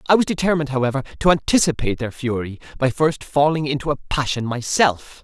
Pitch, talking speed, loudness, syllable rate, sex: 140 Hz, 170 wpm, -20 LUFS, 6.2 syllables/s, male